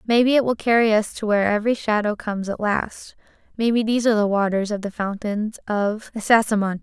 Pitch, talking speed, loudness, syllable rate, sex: 215 Hz, 195 wpm, -21 LUFS, 6.0 syllables/s, female